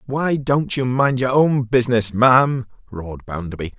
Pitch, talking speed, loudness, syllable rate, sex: 125 Hz, 160 wpm, -18 LUFS, 4.7 syllables/s, male